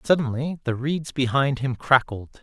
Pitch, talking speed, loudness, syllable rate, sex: 135 Hz, 150 wpm, -23 LUFS, 4.7 syllables/s, male